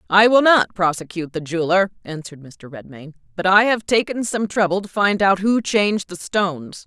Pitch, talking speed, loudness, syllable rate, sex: 190 Hz, 190 wpm, -18 LUFS, 5.4 syllables/s, female